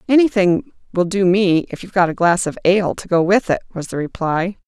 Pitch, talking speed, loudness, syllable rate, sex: 185 Hz, 230 wpm, -17 LUFS, 5.7 syllables/s, female